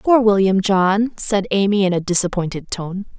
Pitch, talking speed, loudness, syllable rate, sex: 195 Hz, 170 wpm, -18 LUFS, 4.7 syllables/s, female